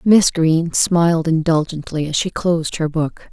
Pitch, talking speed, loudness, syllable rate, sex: 165 Hz, 165 wpm, -17 LUFS, 4.5 syllables/s, female